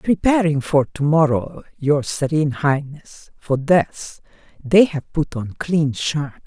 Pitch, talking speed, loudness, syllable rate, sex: 150 Hz, 110 wpm, -19 LUFS, 3.7 syllables/s, female